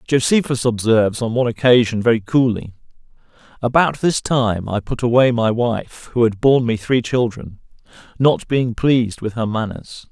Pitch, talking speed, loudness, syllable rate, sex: 120 Hz, 155 wpm, -17 LUFS, 5.0 syllables/s, male